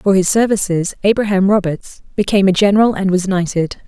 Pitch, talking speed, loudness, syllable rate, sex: 195 Hz, 170 wpm, -15 LUFS, 5.9 syllables/s, female